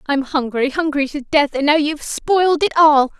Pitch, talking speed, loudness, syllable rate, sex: 295 Hz, 205 wpm, -16 LUFS, 5.1 syllables/s, female